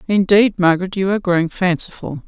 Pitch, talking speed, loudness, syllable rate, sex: 185 Hz, 160 wpm, -16 LUFS, 6.3 syllables/s, female